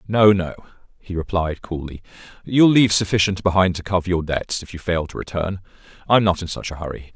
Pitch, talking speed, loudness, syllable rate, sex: 90 Hz, 200 wpm, -20 LUFS, 5.8 syllables/s, male